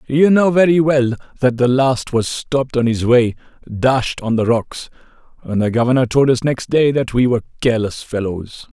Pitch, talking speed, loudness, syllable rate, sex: 125 Hz, 190 wpm, -16 LUFS, 5.0 syllables/s, male